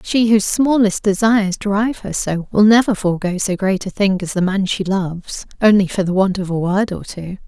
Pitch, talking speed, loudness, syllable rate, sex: 200 Hz, 225 wpm, -17 LUFS, 5.4 syllables/s, female